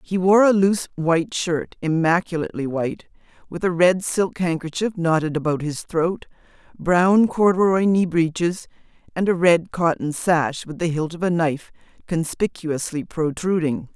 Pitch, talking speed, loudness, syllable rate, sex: 170 Hz, 140 wpm, -21 LUFS, 4.7 syllables/s, female